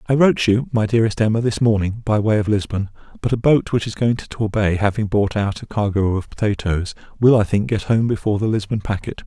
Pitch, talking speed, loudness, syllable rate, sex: 105 Hz, 235 wpm, -19 LUFS, 6.0 syllables/s, male